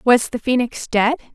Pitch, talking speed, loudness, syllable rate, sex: 245 Hz, 180 wpm, -19 LUFS, 4.7 syllables/s, female